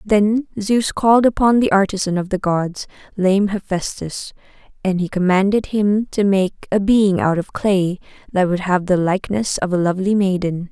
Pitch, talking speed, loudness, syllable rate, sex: 195 Hz, 175 wpm, -18 LUFS, 4.7 syllables/s, female